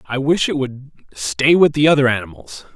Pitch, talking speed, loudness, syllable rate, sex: 130 Hz, 195 wpm, -16 LUFS, 5.1 syllables/s, male